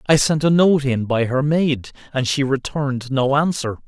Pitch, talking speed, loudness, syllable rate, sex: 140 Hz, 200 wpm, -19 LUFS, 4.6 syllables/s, male